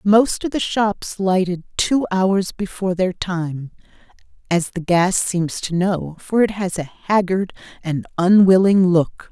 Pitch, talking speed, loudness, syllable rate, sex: 185 Hz, 150 wpm, -19 LUFS, 3.9 syllables/s, female